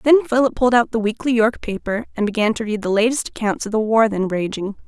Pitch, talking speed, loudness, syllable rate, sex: 225 Hz, 245 wpm, -19 LUFS, 6.1 syllables/s, female